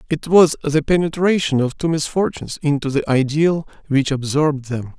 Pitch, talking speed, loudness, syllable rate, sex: 150 Hz, 155 wpm, -18 LUFS, 5.2 syllables/s, male